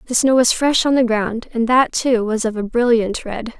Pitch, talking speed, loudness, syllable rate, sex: 235 Hz, 250 wpm, -17 LUFS, 4.8 syllables/s, female